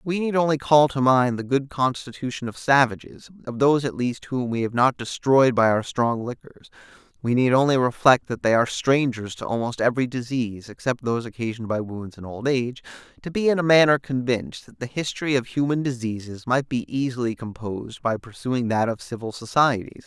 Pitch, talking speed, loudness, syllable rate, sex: 125 Hz, 195 wpm, -23 LUFS, 5.6 syllables/s, male